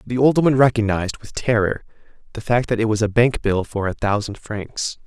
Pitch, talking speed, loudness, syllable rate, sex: 110 Hz, 215 wpm, -20 LUFS, 5.5 syllables/s, male